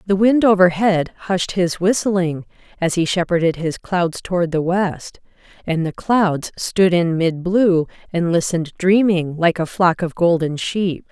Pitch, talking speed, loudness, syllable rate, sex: 175 Hz, 160 wpm, -18 LUFS, 4.1 syllables/s, female